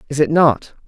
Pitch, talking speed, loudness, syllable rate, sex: 145 Hz, 205 wpm, -15 LUFS, 4.8 syllables/s, female